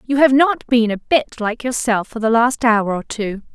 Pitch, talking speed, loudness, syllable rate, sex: 235 Hz, 235 wpm, -17 LUFS, 4.5 syllables/s, female